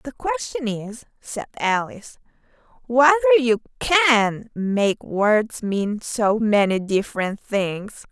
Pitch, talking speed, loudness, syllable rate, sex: 230 Hz, 110 wpm, -20 LUFS, 3.3 syllables/s, female